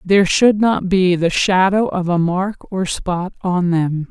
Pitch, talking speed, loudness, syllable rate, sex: 185 Hz, 190 wpm, -16 LUFS, 3.9 syllables/s, female